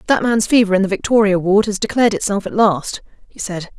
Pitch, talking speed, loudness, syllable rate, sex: 205 Hz, 220 wpm, -16 LUFS, 6.1 syllables/s, female